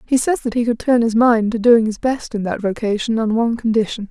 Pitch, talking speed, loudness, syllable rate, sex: 230 Hz, 265 wpm, -17 LUFS, 5.8 syllables/s, female